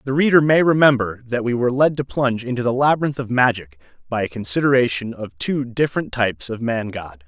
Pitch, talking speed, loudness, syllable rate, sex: 125 Hz, 205 wpm, -19 LUFS, 6.0 syllables/s, male